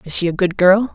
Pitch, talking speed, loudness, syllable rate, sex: 190 Hz, 320 wpm, -15 LUFS, 6.0 syllables/s, female